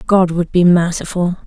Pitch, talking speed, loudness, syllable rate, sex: 175 Hz, 165 wpm, -15 LUFS, 4.7 syllables/s, female